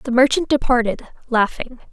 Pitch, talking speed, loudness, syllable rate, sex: 250 Hz, 125 wpm, -18 LUFS, 4.9 syllables/s, female